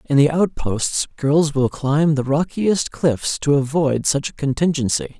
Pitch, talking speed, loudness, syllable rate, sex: 145 Hz, 160 wpm, -19 LUFS, 4.0 syllables/s, male